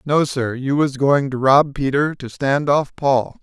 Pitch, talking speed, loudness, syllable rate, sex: 140 Hz, 210 wpm, -18 LUFS, 3.9 syllables/s, male